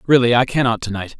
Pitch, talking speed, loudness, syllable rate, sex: 120 Hz, 250 wpm, -17 LUFS, 6.7 syllables/s, male